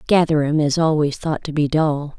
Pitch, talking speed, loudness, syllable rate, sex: 150 Hz, 190 wpm, -19 LUFS, 4.9 syllables/s, female